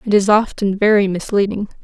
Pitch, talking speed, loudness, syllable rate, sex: 200 Hz, 165 wpm, -16 LUFS, 5.6 syllables/s, female